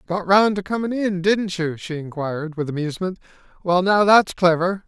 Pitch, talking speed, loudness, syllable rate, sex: 180 Hz, 185 wpm, -20 LUFS, 5.2 syllables/s, male